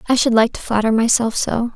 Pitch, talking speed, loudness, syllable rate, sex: 235 Hz, 240 wpm, -17 LUFS, 5.7 syllables/s, female